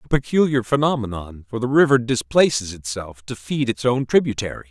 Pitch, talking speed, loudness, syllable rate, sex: 120 Hz, 165 wpm, -20 LUFS, 5.5 syllables/s, male